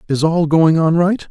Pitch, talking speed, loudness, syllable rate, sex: 165 Hz, 230 wpm, -14 LUFS, 4.4 syllables/s, male